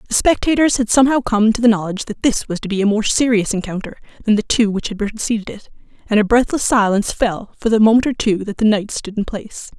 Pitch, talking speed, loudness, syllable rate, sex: 220 Hz, 245 wpm, -17 LUFS, 6.3 syllables/s, female